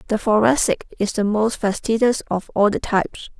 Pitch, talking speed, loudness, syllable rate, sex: 215 Hz, 175 wpm, -20 LUFS, 5.1 syllables/s, female